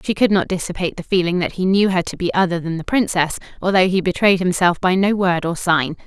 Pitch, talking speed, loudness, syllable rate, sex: 180 Hz, 245 wpm, -18 LUFS, 6.0 syllables/s, female